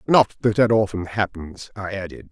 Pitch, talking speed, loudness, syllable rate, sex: 100 Hz, 180 wpm, -21 LUFS, 5.0 syllables/s, male